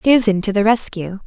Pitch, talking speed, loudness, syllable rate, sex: 210 Hz, 190 wpm, -16 LUFS, 5.3 syllables/s, female